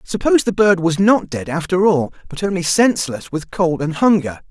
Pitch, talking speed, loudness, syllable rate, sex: 180 Hz, 200 wpm, -17 LUFS, 5.3 syllables/s, male